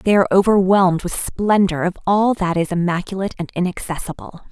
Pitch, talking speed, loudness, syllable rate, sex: 185 Hz, 160 wpm, -18 LUFS, 6.0 syllables/s, female